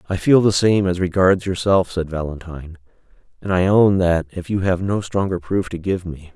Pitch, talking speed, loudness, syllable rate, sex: 90 Hz, 210 wpm, -18 LUFS, 5.1 syllables/s, male